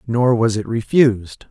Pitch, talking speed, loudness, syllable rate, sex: 115 Hz, 160 wpm, -17 LUFS, 4.4 syllables/s, male